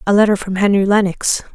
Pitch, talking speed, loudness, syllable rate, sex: 200 Hz, 195 wpm, -15 LUFS, 6.0 syllables/s, female